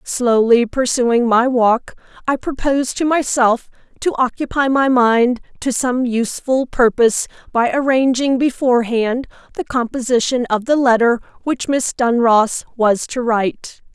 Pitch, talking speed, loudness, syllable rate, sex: 245 Hz, 130 wpm, -16 LUFS, 4.4 syllables/s, female